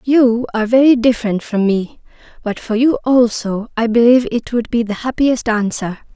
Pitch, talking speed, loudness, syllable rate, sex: 235 Hz, 165 wpm, -15 LUFS, 5.1 syllables/s, female